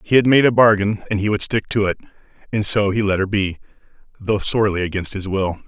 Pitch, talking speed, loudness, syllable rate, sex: 100 Hz, 235 wpm, -18 LUFS, 6.2 syllables/s, male